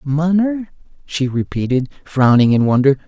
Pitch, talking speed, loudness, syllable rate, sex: 145 Hz, 115 wpm, -16 LUFS, 4.5 syllables/s, male